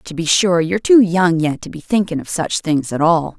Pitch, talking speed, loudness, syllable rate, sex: 170 Hz, 265 wpm, -16 LUFS, 5.2 syllables/s, female